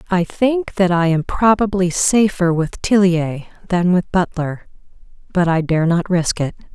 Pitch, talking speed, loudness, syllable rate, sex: 180 Hz, 160 wpm, -17 LUFS, 4.2 syllables/s, female